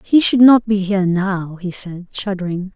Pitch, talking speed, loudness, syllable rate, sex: 195 Hz, 195 wpm, -16 LUFS, 4.7 syllables/s, female